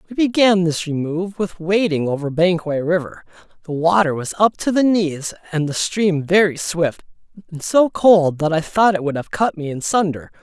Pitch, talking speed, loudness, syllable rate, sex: 175 Hz, 195 wpm, -18 LUFS, 4.9 syllables/s, male